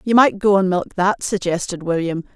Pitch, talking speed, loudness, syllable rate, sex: 190 Hz, 205 wpm, -18 LUFS, 5.1 syllables/s, female